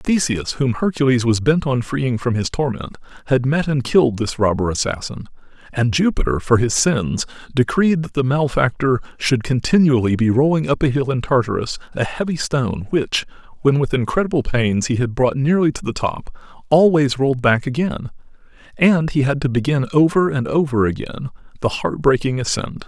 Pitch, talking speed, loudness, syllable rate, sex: 135 Hz, 175 wpm, -18 LUFS, 5.3 syllables/s, male